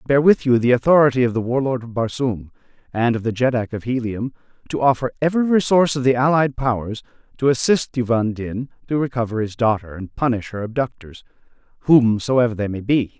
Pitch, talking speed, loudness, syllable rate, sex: 125 Hz, 180 wpm, -19 LUFS, 5.8 syllables/s, male